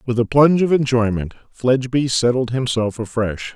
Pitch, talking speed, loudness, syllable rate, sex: 120 Hz, 150 wpm, -18 LUFS, 5.2 syllables/s, male